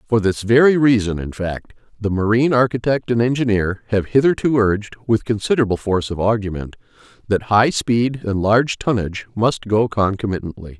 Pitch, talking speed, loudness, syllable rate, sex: 110 Hz, 155 wpm, -18 LUFS, 5.5 syllables/s, male